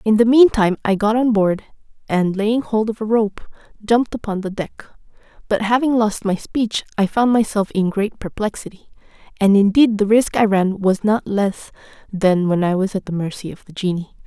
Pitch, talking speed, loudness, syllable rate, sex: 210 Hz, 200 wpm, -18 LUFS, 5.2 syllables/s, female